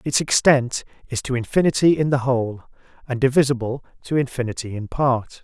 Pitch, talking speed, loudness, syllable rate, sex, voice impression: 130 Hz, 155 wpm, -21 LUFS, 5.6 syllables/s, male, very masculine, adult-like, slightly middle-aged, thick, slightly tensed, weak, slightly dark, hard, slightly clear, fluent, slightly cool, intellectual, slightly refreshing, sincere, very calm, friendly, reassuring, slightly unique, elegant, slightly wild, slightly sweet, slightly lively, kind, slightly intense, slightly modest